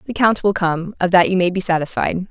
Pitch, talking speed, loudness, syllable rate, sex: 180 Hz, 260 wpm, -17 LUFS, 5.7 syllables/s, female